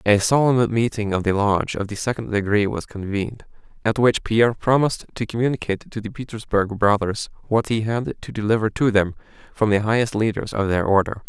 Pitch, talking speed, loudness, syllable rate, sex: 110 Hz, 190 wpm, -21 LUFS, 5.8 syllables/s, male